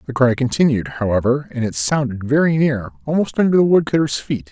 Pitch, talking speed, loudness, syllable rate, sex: 130 Hz, 185 wpm, -18 LUFS, 5.8 syllables/s, male